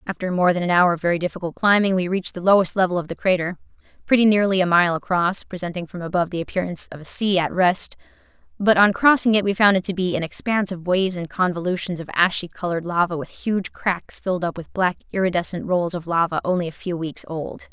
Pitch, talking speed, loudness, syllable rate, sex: 180 Hz, 225 wpm, -21 LUFS, 6.4 syllables/s, female